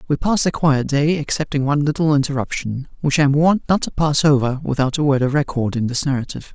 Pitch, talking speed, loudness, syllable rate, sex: 145 Hz, 230 wpm, -18 LUFS, 6.5 syllables/s, male